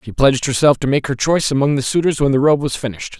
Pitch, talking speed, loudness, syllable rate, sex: 140 Hz, 280 wpm, -16 LUFS, 7.2 syllables/s, male